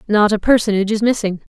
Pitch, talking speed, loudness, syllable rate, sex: 210 Hz, 195 wpm, -16 LUFS, 7.0 syllables/s, female